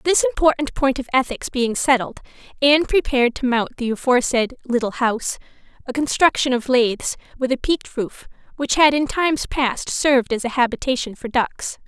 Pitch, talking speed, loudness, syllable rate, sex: 260 Hz, 170 wpm, -20 LUFS, 5.5 syllables/s, female